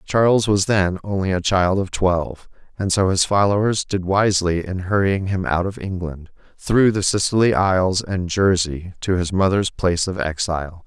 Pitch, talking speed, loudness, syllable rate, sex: 95 Hz, 175 wpm, -19 LUFS, 4.8 syllables/s, male